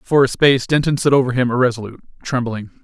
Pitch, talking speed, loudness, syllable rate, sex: 125 Hz, 190 wpm, -17 LUFS, 7.1 syllables/s, male